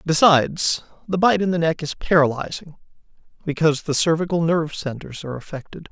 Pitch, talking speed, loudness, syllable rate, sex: 160 Hz, 150 wpm, -20 LUFS, 5.9 syllables/s, male